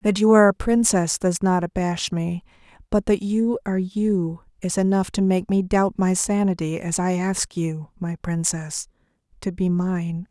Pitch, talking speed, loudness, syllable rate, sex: 185 Hz, 180 wpm, -22 LUFS, 4.4 syllables/s, female